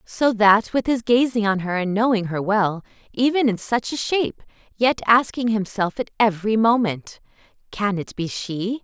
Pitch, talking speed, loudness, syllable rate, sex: 220 Hz, 175 wpm, -20 LUFS, 4.7 syllables/s, female